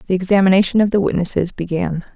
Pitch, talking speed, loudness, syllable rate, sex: 185 Hz, 165 wpm, -17 LUFS, 6.8 syllables/s, female